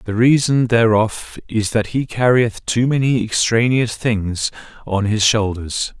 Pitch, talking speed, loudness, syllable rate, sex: 115 Hz, 140 wpm, -17 LUFS, 3.8 syllables/s, male